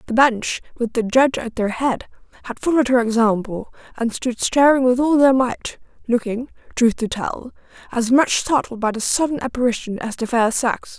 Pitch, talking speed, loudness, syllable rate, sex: 245 Hz, 185 wpm, -19 LUFS, 5.1 syllables/s, female